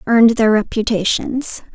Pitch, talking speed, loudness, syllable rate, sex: 225 Hz, 105 wpm, -16 LUFS, 4.6 syllables/s, female